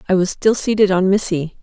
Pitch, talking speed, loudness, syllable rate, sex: 190 Hz, 220 wpm, -16 LUFS, 5.6 syllables/s, female